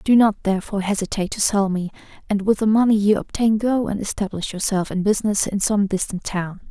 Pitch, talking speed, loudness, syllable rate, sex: 205 Hz, 205 wpm, -20 LUFS, 6.0 syllables/s, female